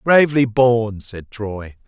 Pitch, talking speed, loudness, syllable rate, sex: 115 Hz, 130 wpm, -17 LUFS, 4.1 syllables/s, male